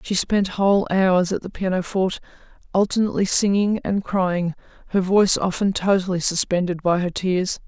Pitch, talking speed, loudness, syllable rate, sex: 190 Hz, 150 wpm, -21 LUFS, 5.2 syllables/s, female